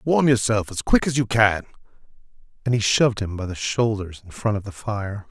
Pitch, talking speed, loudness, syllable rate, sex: 110 Hz, 215 wpm, -22 LUFS, 5.2 syllables/s, male